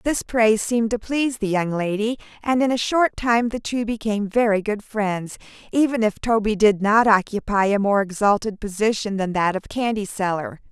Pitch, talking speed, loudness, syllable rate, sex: 215 Hz, 190 wpm, -21 LUFS, 5.1 syllables/s, female